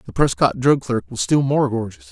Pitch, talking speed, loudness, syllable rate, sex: 130 Hz, 225 wpm, -19 LUFS, 5.3 syllables/s, male